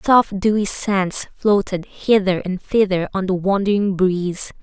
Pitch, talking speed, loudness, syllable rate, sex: 195 Hz, 145 wpm, -19 LUFS, 4.2 syllables/s, female